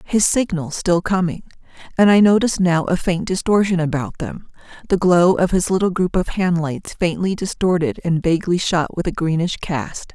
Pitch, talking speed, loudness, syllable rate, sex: 175 Hz, 185 wpm, -18 LUFS, 5.0 syllables/s, female